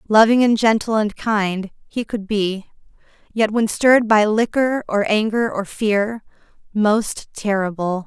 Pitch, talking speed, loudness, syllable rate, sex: 215 Hz, 135 wpm, -18 LUFS, 4.0 syllables/s, female